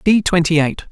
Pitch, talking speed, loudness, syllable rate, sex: 170 Hz, 195 wpm, -15 LUFS, 5.4 syllables/s, male